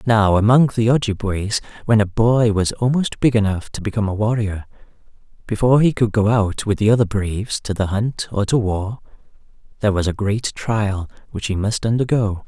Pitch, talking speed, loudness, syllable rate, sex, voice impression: 110 Hz, 190 wpm, -19 LUFS, 5.3 syllables/s, male, masculine, adult-like, slightly relaxed, powerful, soft, raspy, intellectual, friendly, reassuring, wild, slightly kind, slightly modest